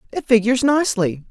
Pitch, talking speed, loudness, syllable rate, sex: 235 Hz, 140 wpm, -18 LUFS, 6.9 syllables/s, female